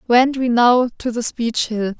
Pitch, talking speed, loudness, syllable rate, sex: 240 Hz, 210 wpm, -17 LUFS, 3.9 syllables/s, female